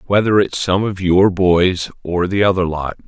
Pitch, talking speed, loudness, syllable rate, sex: 95 Hz, 195 wpm, -16 LUFS, 4.4 syllables/s, male